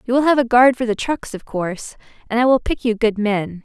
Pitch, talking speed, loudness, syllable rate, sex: 230 Hz, 280 wpm, -18 LUFS, 5.7 syllables/s, female